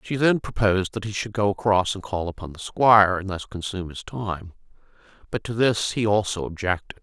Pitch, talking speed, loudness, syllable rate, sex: 100 Hz, 205 wpm, -23 LUFS, 5.5 syllables/s, male